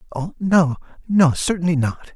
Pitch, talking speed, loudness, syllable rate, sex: 165 Hz, 140 wpm, -19 LUFS, 4.4 syllables/s, male